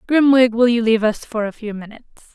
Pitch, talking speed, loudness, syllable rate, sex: 230 Hz, 230 wpm, -16 LUFS, 5.9 syllables/s, female